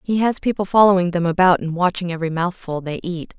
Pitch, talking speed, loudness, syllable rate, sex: 180 Hz, 215 wpm, -19 LUFS, 6.1 syllables/s, female